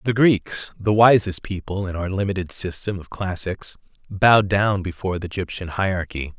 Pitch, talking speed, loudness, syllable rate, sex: 95 Hz, 160 wpm, -21 LUFS, 5.1 syllables/s, male